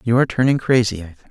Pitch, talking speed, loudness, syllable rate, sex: 115 Hz, 275 wpm, -17 LUFS, 8.3 syllables/s, male